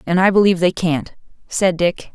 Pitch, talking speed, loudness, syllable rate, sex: 180 Hz, 195 wpm, -17 LUFS, 5.2 syllables/s, female